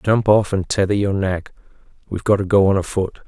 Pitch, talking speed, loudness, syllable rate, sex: 95 Hz, 220 wpm, -18 LUFS, 6.0 syllables/s, male